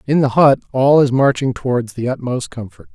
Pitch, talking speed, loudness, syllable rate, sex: 130 Hz, 205 wpm, -15 LUFS, 5.3 syllables/s, male